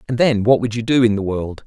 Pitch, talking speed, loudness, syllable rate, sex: 115 Hz, 325 wpm, -17 LUFS, 6.0 syllables/s, male